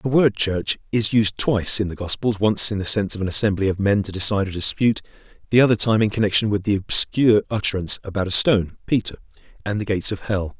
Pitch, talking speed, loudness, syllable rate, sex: 100 Hz, 215 wpm, -20 LUFS, 6.6 syllables/s, male